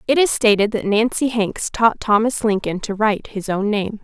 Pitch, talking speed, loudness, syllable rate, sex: 215 Hz, 210 wpm, -18 LUFS, 4.9 syllables/s, female